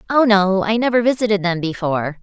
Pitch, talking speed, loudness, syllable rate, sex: 200 Hz, 190 wpm, -17 LUFS, 6.0 syllables/s, female